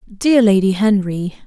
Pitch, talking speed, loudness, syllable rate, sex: 205 Hz, 125 wpm, -15 LUFS, 4.2 syllables/s, female